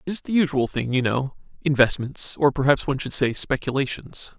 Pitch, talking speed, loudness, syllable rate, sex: 135 Hz, 180 wpm, -22 LUFS, 5.6 syllables/s, male